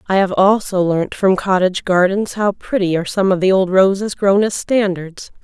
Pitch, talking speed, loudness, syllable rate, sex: 190 Hz, 200 wpm, -16 LUFS, 5.0 syllables/s, female